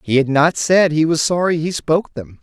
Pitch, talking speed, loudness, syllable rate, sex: 155 Hz, 250 wpm, -16 LUFS, 5.2 syllables/s, male